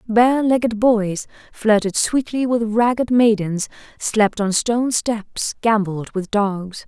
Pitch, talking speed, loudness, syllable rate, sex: 220 Hz, 130 wpm, -19 LUFS, 3.7 syllables/s, female